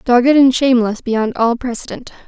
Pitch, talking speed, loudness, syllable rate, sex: 245 Hz, 160 wpm, -14 LUFS, 5.4 syllables/s, female